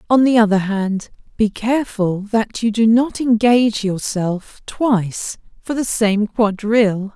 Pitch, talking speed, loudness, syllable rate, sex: 220 Hz, 145 wpm, -17 LUFS, 4.0 syllables/s, female